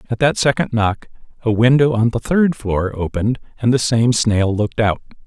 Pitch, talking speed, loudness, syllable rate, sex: 115 Hz, 195 wpm, -17 LUFS, 5.2 syllables/s, male